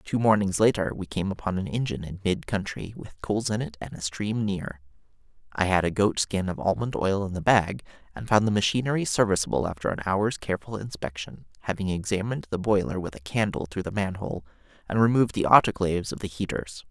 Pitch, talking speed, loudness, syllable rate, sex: 100 Hz, 200 wpm, -26 LUFS, 6.0 syllables/s, male